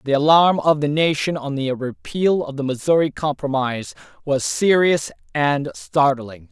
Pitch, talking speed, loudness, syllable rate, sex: 145 Hz, 145 wpm, -19 LUFS, 4.5 syllables/s, male